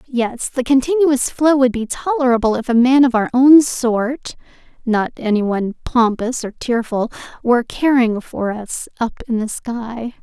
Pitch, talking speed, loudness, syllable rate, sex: 245 Hz, 145 wpm, -17 LUFS, 4.3 syllables/s, female